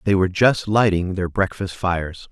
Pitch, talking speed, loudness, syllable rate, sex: 95 Hz, 180 wpm, -20 LUFS, 5.0 syllables/s, male